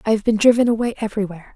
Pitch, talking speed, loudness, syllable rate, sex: 215 Hz, 230 wpm, -18 LUFS, 8.8 syllables/s, female